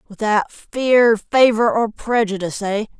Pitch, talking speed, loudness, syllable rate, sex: 220 Hz, 120 wpm, -17 LUFS, 4.6 syllables/s, female